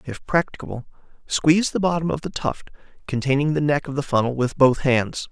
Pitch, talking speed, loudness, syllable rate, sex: 145 Hz, 190 wpm, -21 LUFS, 5.6 syllables/s, male